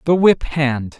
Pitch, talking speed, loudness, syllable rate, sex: 150 Hz, 180 wpm, -17 LUFS, 3.5 syllables/s, male